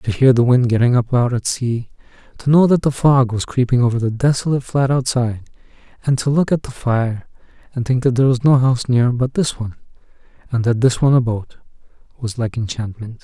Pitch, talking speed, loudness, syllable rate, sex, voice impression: 125 Hz, 210 wpm, -17 LUFS, 5.8 syllables/s, male, masculine, adult-like, slightly soft, sincere, slightly calm, slightly sweet, kind